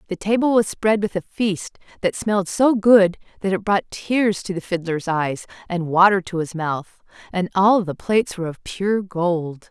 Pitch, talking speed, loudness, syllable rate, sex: 190 Hz, 200 wpm, -20 LUFS, 4.5 syllables/s, female